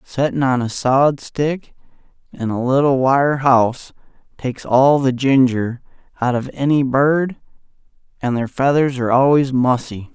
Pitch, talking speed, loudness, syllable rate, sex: 130 Hz, 140 wpm, -17 LUFS, 4.5 syllables/s, male